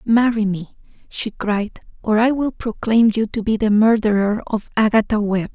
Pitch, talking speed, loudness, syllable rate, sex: 215 Hz, 175 wpm, -18 LUFS, 4.6 syllables/s, female